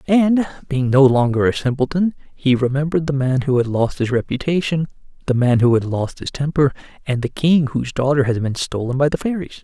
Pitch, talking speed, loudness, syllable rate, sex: 140 Hz, 205 wpm, -18 LUFS, 5.7 syllables/s, male